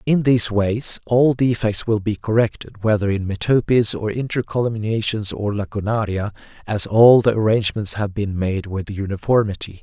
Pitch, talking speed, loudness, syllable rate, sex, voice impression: 110 Hz, 145 wpm, -19 LUFS, 5.0 syllables/s, male, masculine, adult-like, tensed, slightly bright, soft, slightly raspy, cool, intellectual, calm, slightly friendly, reassuring, wild, slightly lively, slightly kind